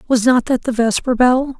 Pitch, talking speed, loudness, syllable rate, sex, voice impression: 245 Hz, 225 wpm, -15 LUFS, 5.0 syllables/s, female, feminine, adult-like, slightly relaxed, powerful, slightly bright, slightly muffled, raspy, intellectual, friendly, reassuring, slightly lively, slightly sharp